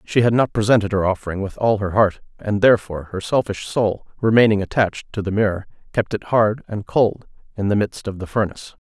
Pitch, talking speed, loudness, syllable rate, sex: 105 Hz, 210 wpm, -20 LUFS, 5.9 syllables/s, male